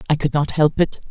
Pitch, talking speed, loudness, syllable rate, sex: 150 Hz, 270 wpm, -19 LUFS, 5.9 syllables/s, female